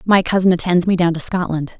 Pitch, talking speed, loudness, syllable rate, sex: 175 Hz, 235 wpm, -16 LUFS, 5.9 syllables/s, female